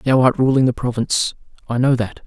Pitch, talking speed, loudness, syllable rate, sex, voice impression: 125 Hz, 185 wpm, -18 LUFS, 5.8 syllables/s, male, masculine, adult-like, relaxed, slightly weak, slightly halting, slightly raspy, cool, intellectual, sincere, kind, modest